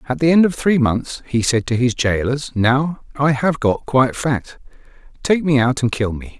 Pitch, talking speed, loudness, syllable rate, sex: 130 Hz, 215 wpm, -18 LUFS, 4.6 syllables/s, male